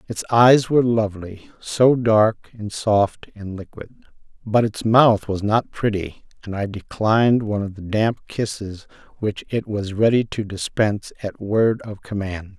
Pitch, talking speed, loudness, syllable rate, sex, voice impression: 105 Hz, 160 wpm, -20 LUFS, 4.3 syllables/s, male, very masculine, slightly old, very thick, tensed, powerful, slightly bright, slightly soft, clear, slightly fluent, raspy, cool, very intellectual, refreshing, sincere, very calm, mature, friendly, reassuring, unique, slightly elegant, wild, sweet, lively, kind, slightly modest